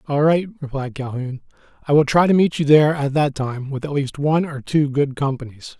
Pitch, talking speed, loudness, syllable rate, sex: 145 Hz, 230 wpm, -19 LUFS, 5.5 syllables/s, male